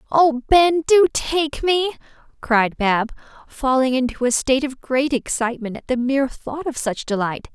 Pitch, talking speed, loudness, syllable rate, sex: 270 Hz, 165 wpm, -19 LUFS, 4.6 syllables/s, female